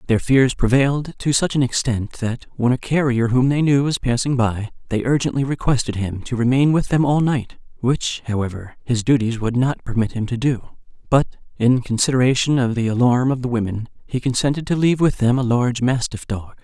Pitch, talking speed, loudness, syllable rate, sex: 125 Hz, 200 wpm, -19 LUFS, 5.4 syllables/s, male